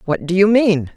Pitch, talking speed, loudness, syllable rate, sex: 185 Hz, 250 wpm, -15 LUFS, 4.9 syllables/s, female